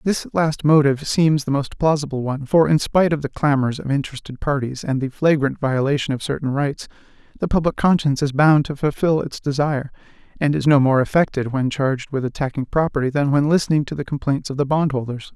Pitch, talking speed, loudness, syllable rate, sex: 145 Hz, 205 wpm, -19 LUFS, 6.0 syllables/s, male